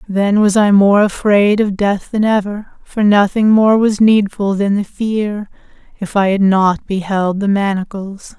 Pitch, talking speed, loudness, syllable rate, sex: 200 Hz, 170 wpm, -14 LUFS, 4.1 syllables/s, female